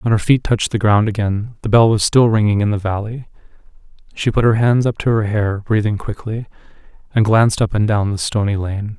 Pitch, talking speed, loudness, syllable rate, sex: 110 Hz, 220 wpm, -16 LUFS, 5.6 syllables/s, male